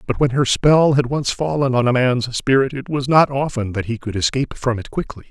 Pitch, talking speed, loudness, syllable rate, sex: 130 Hz, 250 wpm, -18 LUFS, 5.5 syllables/s, male